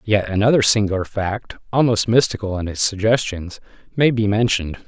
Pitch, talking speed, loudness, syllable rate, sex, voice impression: 105 Hz, 150 wpm, -18 LUFS, 5.4 syllables/s, male, very masculine, very middle-aged, very thick, tensed, very powerful, slightly bright, soft, muffled, fluent, slightly raspy, very cool, intellectual, slightly refreshing, sincere, calm, mature, very friendly, very reassuring, unique, elegant, slightly wild, sweet, lively, kind, slightly modest